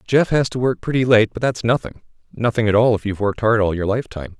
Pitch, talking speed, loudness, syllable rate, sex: 115 Hz, 245 wpm, -18 LUFS, 6.9 syllables/s, male